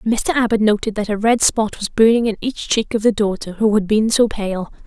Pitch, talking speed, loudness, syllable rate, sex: 215 Hz, 245 wpm, -17 LUFS, 5.3 syllables/s, female